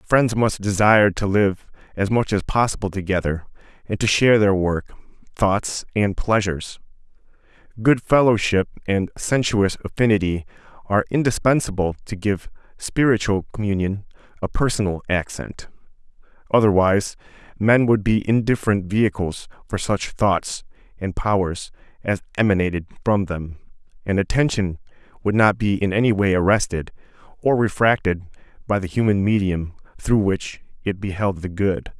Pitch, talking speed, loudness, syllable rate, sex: 100 Hz, 130 wpm, -20 LUFS, 5.0 syllables/s, male